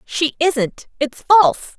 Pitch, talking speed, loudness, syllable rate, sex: 290 Hz, 135 wpm, -17 LUFS, 3.7 syllables/s, female